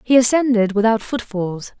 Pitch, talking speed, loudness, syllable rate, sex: 225 Hz, 135 wpm, -18 LUFS, 4.9 syllables/s, female